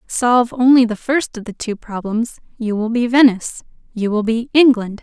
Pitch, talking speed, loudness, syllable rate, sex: 235 Hz, 190 wpm, -16 LUFS, 5.0 syllables/s, female